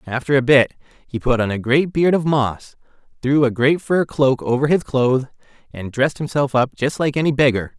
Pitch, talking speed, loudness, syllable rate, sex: 135 Hz, 210 wpm, -18 LUFS, 5.3 syllables/s, male